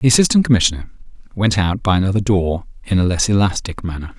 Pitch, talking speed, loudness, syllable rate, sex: 100 Hz, 185 wpm, -17 LUFS, 6.5 syllables/s, male